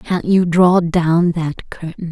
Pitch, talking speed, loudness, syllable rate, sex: 170 Hz, 170 wpm, -15 LUFS, 3.4 syllables/s, female